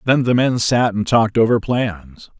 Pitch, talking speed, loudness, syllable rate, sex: 115 Hz, 200 wpm, -17 LUFS, 4.6 syllables/s, male